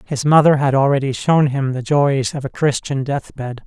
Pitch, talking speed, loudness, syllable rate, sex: 135 Hz, 195 wpm, -17 LUFS, 4.8 syllables/s, male